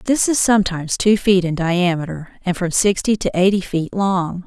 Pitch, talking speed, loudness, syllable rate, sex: 185 Hz, 190 wpm, -18 LUFS, 5.1 syllables/s, female